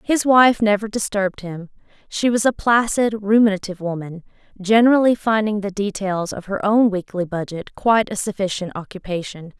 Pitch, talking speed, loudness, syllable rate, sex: 205 Hz, 150 wpm, -19 LUFS, 5.3 syllables/s, female